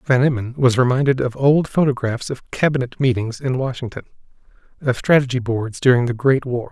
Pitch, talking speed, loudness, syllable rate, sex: 130 Hz, 170 wpm, -19 LUFS, 5.5 syllables/s, male